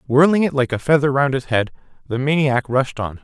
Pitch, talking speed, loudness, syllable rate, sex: 135 Hz, 220 wpm, -18 LUFS, 5.6 syllables/s, male